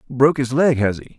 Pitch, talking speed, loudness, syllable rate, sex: 130 Hz, 255 wpm, -18 LUFS, 5.9 syllables/s, male